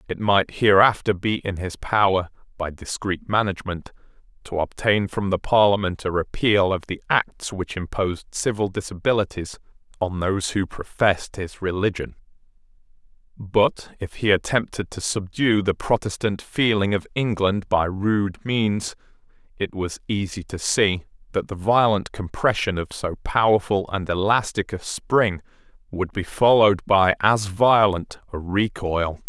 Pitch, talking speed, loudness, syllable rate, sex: 100 Hz, 140 wpm, -22 LUFS, 4.5 syllables/s, male